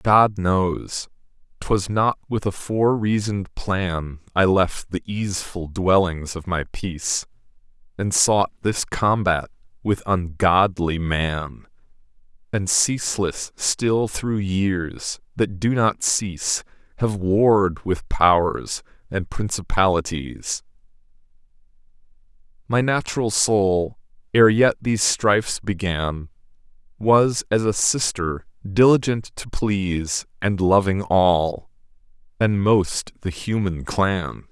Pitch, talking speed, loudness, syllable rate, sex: 95 Hz, 110 wpm, -21 LUFS, 3.4 syllables/s, male